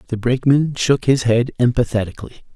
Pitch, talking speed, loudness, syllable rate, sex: 125 Hz, 140 wpm, -17 LUFS, 5.9 syllables/s, male